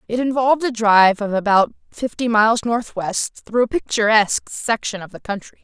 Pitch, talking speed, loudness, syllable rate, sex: 220 Hz, 170 wpm, -18 LUFS, 5.3 syllables/s, female